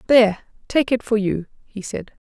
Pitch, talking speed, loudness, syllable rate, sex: 220 Hz, 185 wpm, -21 LUFS, 5.2 syllables/s, female